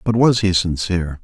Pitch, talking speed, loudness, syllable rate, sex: 95 Hz, 195 wpm, -17 LUFS, 5.3 syllables/s, male